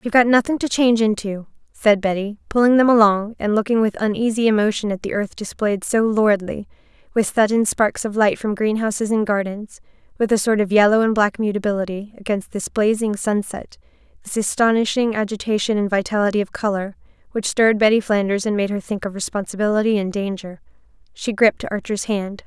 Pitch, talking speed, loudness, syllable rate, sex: 210 Hz, 175 wpm, -19 LUFS, 5.8 syllables/s, female